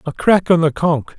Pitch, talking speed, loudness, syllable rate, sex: 165 Hz, 255 wpm, -15 LUFS, 4.7 syllables/s, male